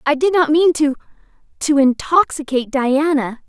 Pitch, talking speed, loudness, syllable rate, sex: 290 Hz, 105 wpm, -16 LUFS, 4.8 syllables/s, female